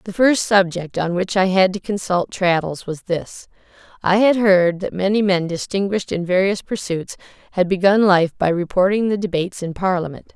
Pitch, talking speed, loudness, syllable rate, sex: 190 Hz, 175 wpm, -18 LUFS, 5.1 syllables/s, female